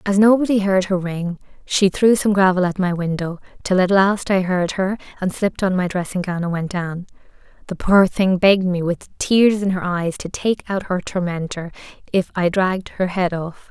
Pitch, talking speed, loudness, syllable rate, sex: 185 Hz, 215 wpm, -19 LUFS, 5.0 syllables/s, female